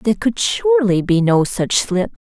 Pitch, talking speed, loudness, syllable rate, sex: 215 Hz, 185 wpm, -16 LUFS, 4.7 syllables/s, female